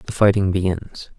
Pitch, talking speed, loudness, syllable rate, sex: 95 Hz, 150 wpm, -19 LUFS, 4.6 syllables/s, male